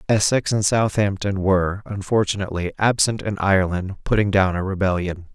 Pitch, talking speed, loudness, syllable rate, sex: 100 Hz, 135 wpm, -20 LUFS, 5.4 syllables/s, male